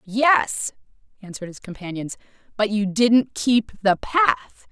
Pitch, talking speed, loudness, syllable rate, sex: 215 Hz, 125 wpm, -21 LUFS, 3.8 syllables/s, female